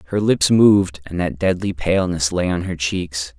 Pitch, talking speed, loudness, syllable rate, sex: 85 Hz, 195 wpm, -18 LUFS, 4.8 syllables/s, male